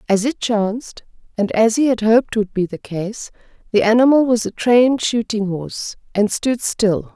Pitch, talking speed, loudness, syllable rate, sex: 220 Hz, 185 wpm, -17 LUFS, 4.8 syllables/s, female